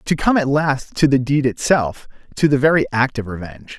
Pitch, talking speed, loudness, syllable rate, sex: 135 Hz, 220 wpm, -17 LUFS, 5.4 syllables/s, male